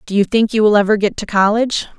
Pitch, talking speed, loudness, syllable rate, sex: 210 Hz, 270 wpm, -15 LUFS, 6.8 syllables/s, female